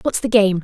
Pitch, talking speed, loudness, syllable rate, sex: 200 Hz, 285 wpm, -16 LUFS, 5.7 syllables/s, female